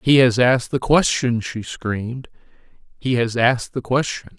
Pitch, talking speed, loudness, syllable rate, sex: 120 Hz, 150 wpm, -19 LUFS, 4.9 syllables/s, male